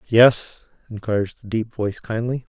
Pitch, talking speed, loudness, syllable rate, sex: 110 Hz, 140 wpm, -21 LUFS, 5.4 syllables/s, male